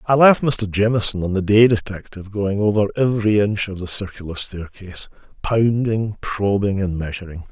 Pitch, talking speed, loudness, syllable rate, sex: 105 Hz, 160 wpm, -19 LUFS, 5.2 syllables/s, male